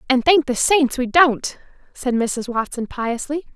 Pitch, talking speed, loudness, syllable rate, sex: 260 Hz, 170 wpm, -19 LUFS, 4.1 syllables/s, female